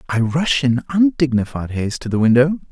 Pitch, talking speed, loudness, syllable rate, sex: 135 Hz, 175 wpm, -17 LUFS, 5.4 syllables/s, male